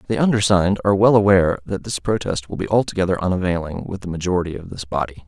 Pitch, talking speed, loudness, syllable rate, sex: 95 Hz, 205 wpm, -19 LUFS, 7.0 syllables/s, male